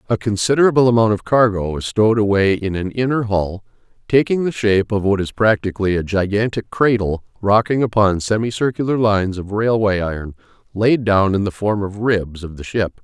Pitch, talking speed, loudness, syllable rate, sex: 105 Hz, 180 wpm, -17 LUFS, 5.5 syllables/s, male